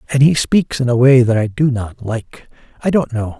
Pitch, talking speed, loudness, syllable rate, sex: 125 Hz, 230 wpm, -15 LUFS, 5.1 syllables/s, male